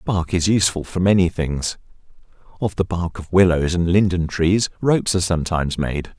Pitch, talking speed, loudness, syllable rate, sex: 90 Hz, 175 wpm, -19 LUFS, 5.5 syllables/s, male